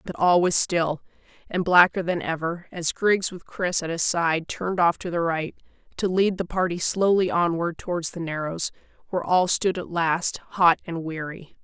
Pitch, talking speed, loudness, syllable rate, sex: 170 Hz, 190 wpm, -23 LUFS, 4.7 syllables/s, female